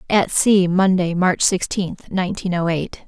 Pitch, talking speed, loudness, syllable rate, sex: 180 Hz, 155 wpm, -18 LUFS, 4.2 syllables/s, female